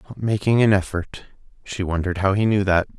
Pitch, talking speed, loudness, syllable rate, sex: 100 Hz, 200 wpm, -20 LUFS, 5.7 syllables/s, male